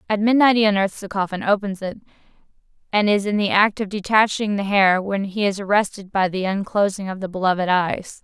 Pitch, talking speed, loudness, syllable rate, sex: 200 Hz, 205 wpm, -20 LUFS, 5.6 syllables/s, female